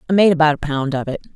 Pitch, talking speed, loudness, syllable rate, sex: 155 Hz, 310 wpm, -17 LUFS, 7.8 syllables/s, female